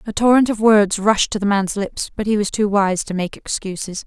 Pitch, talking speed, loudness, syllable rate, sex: 205 Hz, 250 wpm, -18 LUFS, 5.2 syllables/s, female